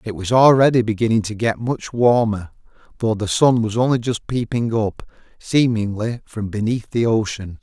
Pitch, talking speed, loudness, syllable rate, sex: 115 Hz, 165 wpm, -19 LUFS, 4.8 syllables/s, male